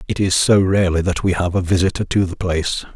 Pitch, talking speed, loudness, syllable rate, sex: 90 Hz, 245 wpm, -17 LUFS, 6.3 syllables/s, male